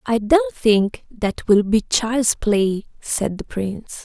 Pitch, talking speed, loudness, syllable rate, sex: 215 Hz, 165 wpm, -19 LUFS, 3.2 syllables/s, female